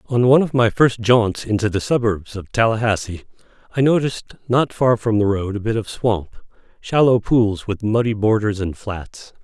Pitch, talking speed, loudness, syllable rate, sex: 110 Hz, 180 wpm, -18 LUFS, 4.9 syllables/s, male